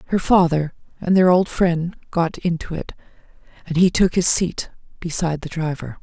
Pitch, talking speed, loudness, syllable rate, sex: 170 Hz, 170 wpm, -19 LUFS, 5.1 syllables/s, female